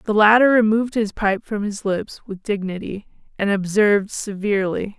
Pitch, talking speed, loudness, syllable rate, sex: 205 Hz, 155 wpm, -19 LUFS, 5.0 syllables/s, female